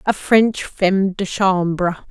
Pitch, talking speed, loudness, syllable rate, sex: 190 Hz, 145 wpm, -17 LUFS, 3.5 syllables/s, female